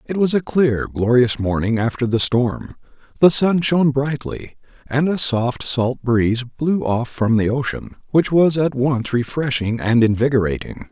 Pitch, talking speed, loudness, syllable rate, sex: 130 Hz, 165 wpm, -18 LUFS, 4.4 syllables/s, male